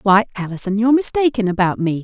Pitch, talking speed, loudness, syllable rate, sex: 210 Hz, 175 wpm, -17 LUFS, 6.6 syllables/s, female